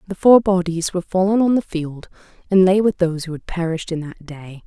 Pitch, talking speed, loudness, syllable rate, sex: 180 Hz, 230 wpm, -18 LUFS, 5.9 syllables/s, female